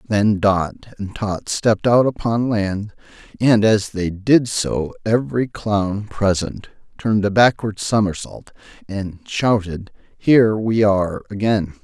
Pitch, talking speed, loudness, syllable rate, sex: 105 Hz, 130 wpm, -19 LUFS, 3.9 syllables/s, male